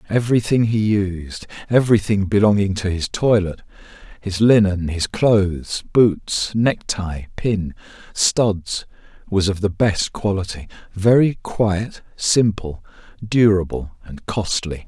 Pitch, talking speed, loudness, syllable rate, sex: 100 Hz, 110 wpm, -19 LUFS, 3.8 syllables/s, male